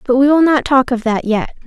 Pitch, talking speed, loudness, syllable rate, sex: 260 Hz, 290 wpm, -14 LUFS, 5.4 syllables/s, female